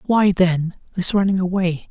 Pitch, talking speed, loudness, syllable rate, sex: 185 Hz, 160 wpm, -19 LUFS, 4.5 syllables/s, male